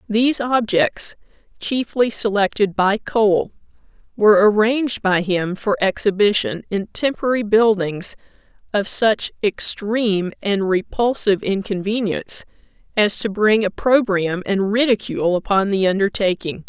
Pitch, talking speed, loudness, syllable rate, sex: 205 Hz, 110 wpm, -18 LUFS, 4.5 syllables/s, female